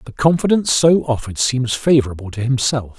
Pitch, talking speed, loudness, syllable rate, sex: 130 Hz, 160 wpm, -17 LUFS, 6.0 syllables/s, male